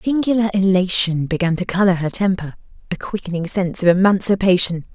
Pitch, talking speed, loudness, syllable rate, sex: 185 Hz, 160 wpm, -18 LUFS, 6.1 syllables/s, female